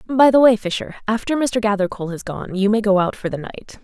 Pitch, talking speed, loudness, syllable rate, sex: 215 Hz, 250 wpm, -18 LUFS, 5.9 syllables/s, female